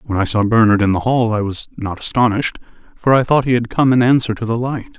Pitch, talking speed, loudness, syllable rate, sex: 115 Hz, 265 wpm, -16 LUFS, 6.3 syllables/s, male